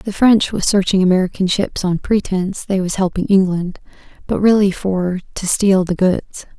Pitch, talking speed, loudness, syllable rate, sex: 190 Hz, 175 wpm, -16 LUFS, 4.8 syllables/s, female